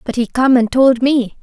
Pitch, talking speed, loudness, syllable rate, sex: 250 Hz, 255 wpm, -13 LUFS, 4.7 syllables/s, female